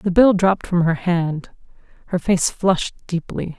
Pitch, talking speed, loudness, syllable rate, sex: 180 Hz, 170 wpm, -19 LUFS, 4.6 syllables/s, female